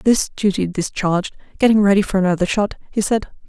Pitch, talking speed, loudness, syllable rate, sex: 200 Hz, 170 wpm, -18 LUFS, 5.9 syllables/s, female